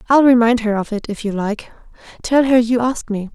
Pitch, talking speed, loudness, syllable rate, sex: 235 Hz, 215 wpm, -16 LUFS, 5.7 syllables/s, female